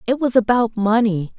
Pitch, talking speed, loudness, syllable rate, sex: 225 Hz, 175 wpm, -18 LUFS, 4.9 syllables/s, female